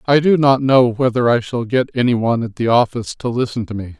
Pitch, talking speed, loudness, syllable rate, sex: 120 Hz, 255 wpm, -16 LUFS, 5.9 syllables/s, male